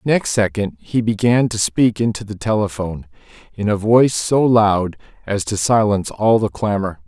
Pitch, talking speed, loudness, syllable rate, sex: 105 Hz, 170 wpm, -17 LUFS, 4.9 syllables/s, male